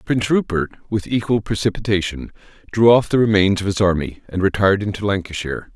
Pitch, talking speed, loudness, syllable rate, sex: 100 Hz, 165 wpm, -19 LUFS, 6.2 syllables/s, male